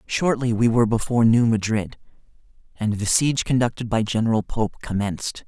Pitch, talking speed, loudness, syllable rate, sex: 115 Hz, 155 wpm, -21 LUFS, 5.7 syllables/s, male